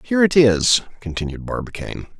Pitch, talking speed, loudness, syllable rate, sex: 120 Hz, 135 wpm, -18 LUFS, 6.0 syllables/s, male